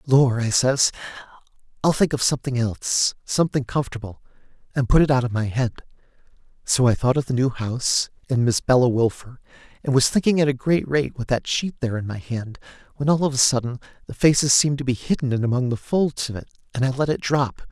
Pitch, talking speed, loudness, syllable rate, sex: 130 Hz, 210 wpm, -21 LUFS, 6.0 syllables/s, male